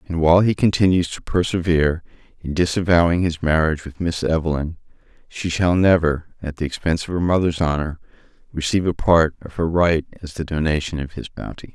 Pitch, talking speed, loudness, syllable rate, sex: 80 Hz, 180 wpm, -20 LUFS, 5.8 syllables/s, male